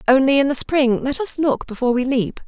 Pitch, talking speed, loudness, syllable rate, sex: 265 Hz, 240 wpm, -18 LUFS, 5.6 syllables/s, female